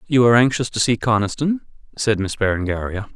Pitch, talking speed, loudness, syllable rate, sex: 115 Hz, 170 wpm, -19 LUFS, 6.2 syllables/s, male